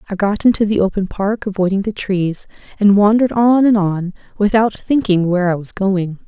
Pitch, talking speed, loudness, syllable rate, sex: 200 Hz, 190 wpm, -16 LUFS, 5.3 syllables/s, female